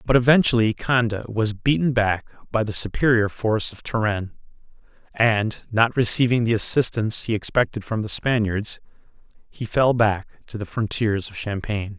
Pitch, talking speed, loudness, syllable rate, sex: 110 Hz, 150 wpm, -21 LUFS, 5.1 syllables/s, male